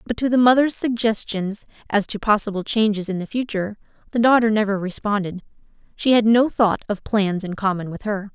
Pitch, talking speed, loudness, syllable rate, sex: 210 Hz, 185 wpm, -20 LUFS, 5.6 syllables/s, female